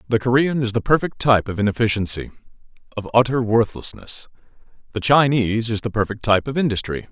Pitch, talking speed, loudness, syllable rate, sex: 115 Hz, 150 wpm, -19 LUFS, 6.3 syllables/s, male